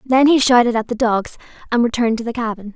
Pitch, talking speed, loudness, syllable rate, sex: 235 Hz, 240 wpm, -17 LUFS, 6.5 syllables/s, female